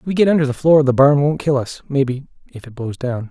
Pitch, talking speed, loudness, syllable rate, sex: 140 Hz, 290 wpm, -16 LUFS, 6.1 syllables/s, male